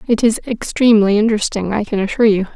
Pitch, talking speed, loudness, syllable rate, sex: 215 Hz, 190 wpm, -15 LUFS, 7.0 syllables/s, female